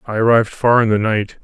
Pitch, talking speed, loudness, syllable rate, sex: 110 Hz, 250 wpm, -15 LUFS, 6.1 syllables/s, male